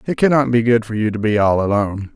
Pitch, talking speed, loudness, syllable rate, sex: 115 Hz, 280 wpm, -17 LUFS, 6.5 syllables/s, male